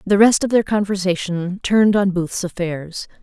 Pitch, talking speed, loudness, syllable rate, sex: 190 Hz, 170 wpm, -18 LUFS, 4.9 syllables/s, female